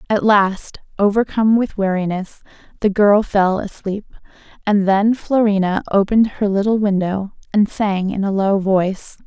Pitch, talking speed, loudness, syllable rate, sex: 200 Hz, 140 wpm, -17 LUFS, 4.6 syllables/s, female